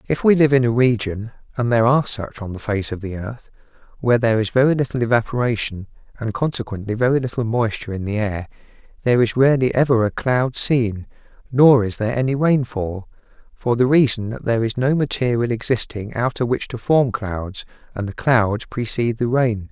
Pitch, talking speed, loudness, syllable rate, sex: 120 Hz, 185 wpm, -19 LUFS, 5.7 syllables/s, male